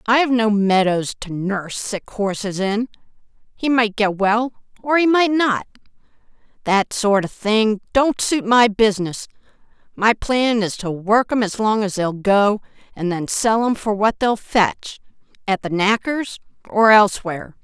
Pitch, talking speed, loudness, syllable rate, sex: 215 Hz, 165 wpm, -18 LUFS, 4.3 syllables/s, female